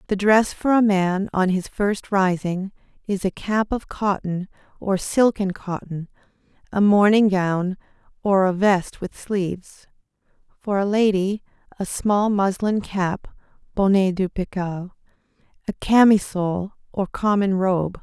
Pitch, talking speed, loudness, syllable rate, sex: 195 Hz, 135 wpm, -21 LUFS, 3.8 syllables/s, female